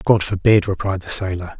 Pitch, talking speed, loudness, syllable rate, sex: 95 Hz, 190 wpm, -18 LUFS, 5.4 syllables/s, male